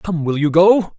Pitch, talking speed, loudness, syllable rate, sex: 170 Hz, 245 wpm, -15 LUFS, 4.3 syllables/s, male